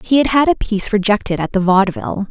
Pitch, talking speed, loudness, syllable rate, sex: 205 Hz, 235 wpm, -16 LUFS, 6.8 syllables/s, female